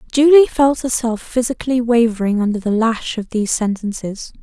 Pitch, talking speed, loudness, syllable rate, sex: 235 Hz, 150 wpm, -16 LUFS, 5.4 syllables/s, female